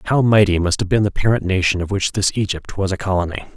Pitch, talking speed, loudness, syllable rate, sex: 95 Hz, 270 wpm, -18 LUFS, 6.5 syllables/s, male